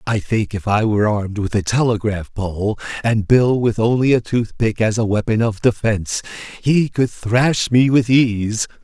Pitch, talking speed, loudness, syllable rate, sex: 110 Hz, 190 wpm, -18 LUFS, 4.6 syllables/s, male